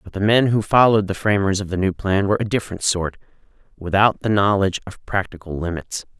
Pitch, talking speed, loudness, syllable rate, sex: 100 Hz, 205 wpm, -19 LUFS, 6.2 syllables/s, male